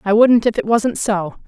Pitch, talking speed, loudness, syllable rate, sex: 215 Hz, 245 wpm, -16 LUFS, 4.7 syllables/s, female